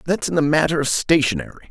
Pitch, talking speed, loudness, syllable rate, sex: 140 Hz, 210 wpm, -19 LUFS, 7.1 syllables/s, male